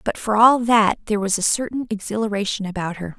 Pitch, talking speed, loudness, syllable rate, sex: 210 Hz, 205 wpm, -19 LUFS, 6.1 syllables/s, female